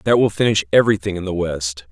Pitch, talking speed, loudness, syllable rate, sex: 95 Hz, 220 wpm, -18 LUFS, 6.4 syllables/s, male